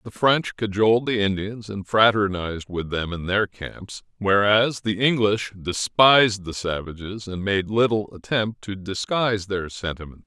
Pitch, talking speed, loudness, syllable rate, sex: 105 Hz, 150 wpm, -22 LUFS, 4.4 syllables/s, male